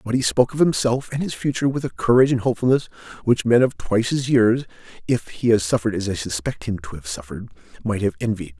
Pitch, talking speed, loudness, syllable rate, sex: 115 Hz, 230 wpm, -21 LUFS, 5.0 syllables/s, male